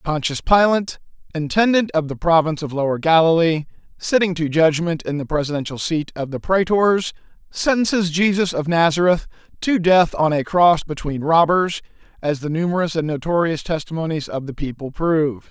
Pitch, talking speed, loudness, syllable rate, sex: 165 Hz, 155 wpm, -19 LUFS, 5.3 syllables/s, male